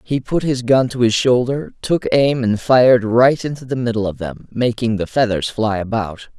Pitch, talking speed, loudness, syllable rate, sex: 120 Hz, 205 wpm, -17 LUFS, 4.8 syllables/s, male